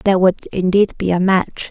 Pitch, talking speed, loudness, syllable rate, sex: 185 Hz, 210 wpm, -16 LUFS, 4.8 syllables/s, female